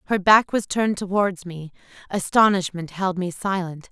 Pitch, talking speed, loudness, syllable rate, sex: 190 Hz, 155 wpm, -21 LUFS, 4.8 syllables/s, female